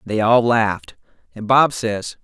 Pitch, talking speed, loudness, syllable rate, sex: 115 Hz, 160 wpm, -17 LUFS, 4.0 syllables/s, male